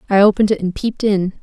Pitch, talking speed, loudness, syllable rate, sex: 200 Hz, 255 wpm, -16 LUFS, 7.8 syllables/s, female